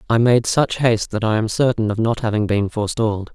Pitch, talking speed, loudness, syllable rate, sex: 110 Hz, 235 wpm, -19 LUFS, 6.0 syllables/s, male